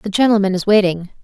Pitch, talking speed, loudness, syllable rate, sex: 200 Hz, 195 wpm, -15 LUFS, 6.4 syllables/s, female